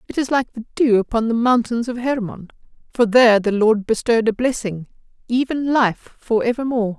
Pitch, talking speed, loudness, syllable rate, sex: 230 Hz, 180 wpm, -18 LUFS, 5.4 syllables/s, female